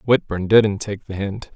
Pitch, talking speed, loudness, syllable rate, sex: 105 Hz, 195 wpm, -20 LUFS, 4.2 syllables/s, male